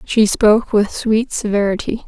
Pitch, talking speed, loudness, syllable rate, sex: 215 Hz, 145 wpm, -16 LUFS, 4.6 syllables/s, female